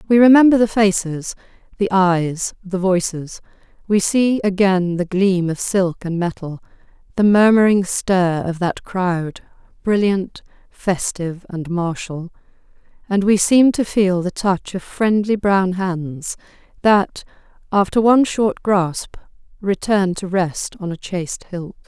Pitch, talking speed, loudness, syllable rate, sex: 190 Hz, 135 wpm, -18 LUFS, 3.9 syllables/s, female